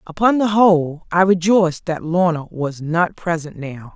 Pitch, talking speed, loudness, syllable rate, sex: 170 Hz, 165 wpm, -17 LUFS, 4.6 syllables/s, female